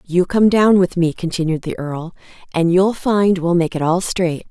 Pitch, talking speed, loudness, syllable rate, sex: 180 Hz, 215 wpm, -17 LUFS, 4.6 syllables/s, female